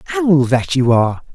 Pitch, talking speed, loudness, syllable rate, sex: 130 Hz, 180 wpm, -15 LUFS, 7.3 syllables/s, male